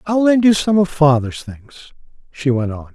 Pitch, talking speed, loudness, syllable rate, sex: 155 Hz, 205 wpm, -16 LUFS, 4.6 syllables/s, male